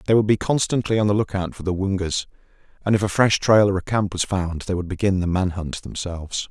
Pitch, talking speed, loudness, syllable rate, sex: 95 Hz, 250 wpm, -21 LUFS, 5.9 syllables/s, male